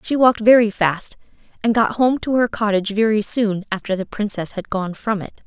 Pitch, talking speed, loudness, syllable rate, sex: 210 Hz, 210 wpm, -19 LUFS, 5.5 syllables/s, female